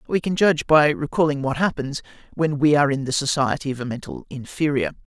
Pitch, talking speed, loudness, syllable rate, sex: 145 Hz, 195 wpm, -21 LUFS, 6.1 syllables/s, male